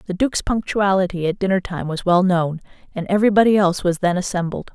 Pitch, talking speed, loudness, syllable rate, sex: 185 Hz, 190 wpm, -19 LUFS, 6.4 syllables/s, female